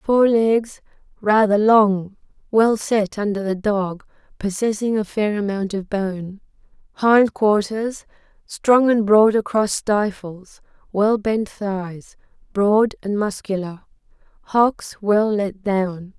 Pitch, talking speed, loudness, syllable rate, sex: 205 Hz, 110 wpm, -19 LUFS, 3.3 syllables/s, female